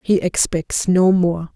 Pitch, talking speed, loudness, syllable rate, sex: 175 Hz, 155 wpm, -17 LUFS, 3.5 syllables/s, female